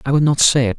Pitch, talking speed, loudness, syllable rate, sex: 135 Hz, 385 wpm, -14 LUFS, 7.3 syllables/s, male